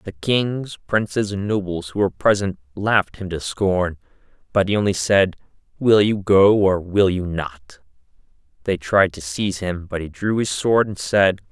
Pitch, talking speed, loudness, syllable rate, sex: 95 Hz, 180 wpm, -20 LUFS, 4.5 syllables/s, male